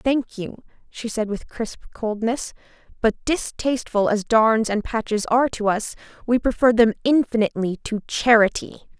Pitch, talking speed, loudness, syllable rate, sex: 225 Hz, 140 wpm, -21 LUFS, 4.8 syllables/s, female